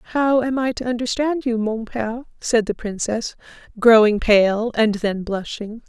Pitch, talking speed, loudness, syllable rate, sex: 230 Hz, 165 wpm, -19 LUFS, 4.4 syllables/s, female